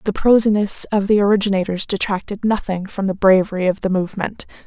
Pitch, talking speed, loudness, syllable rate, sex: 200 Hz, 165 wpm, -18 LUFS, 6.0 syllables/s, female